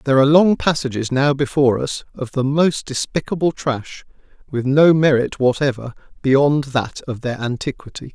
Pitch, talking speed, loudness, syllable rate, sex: 135 Hz, 155 wpm, -18 LUFS, 5.0 syllables/s, male